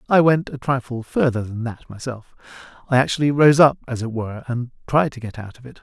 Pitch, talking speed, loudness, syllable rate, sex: 125 Hz, 225 wpm, -20 LUFS, 5.8 syllables/s, male